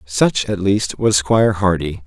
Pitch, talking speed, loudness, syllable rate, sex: 95 Hz, 175 wpm, -17 LUFS, 4.1 syllables/s, male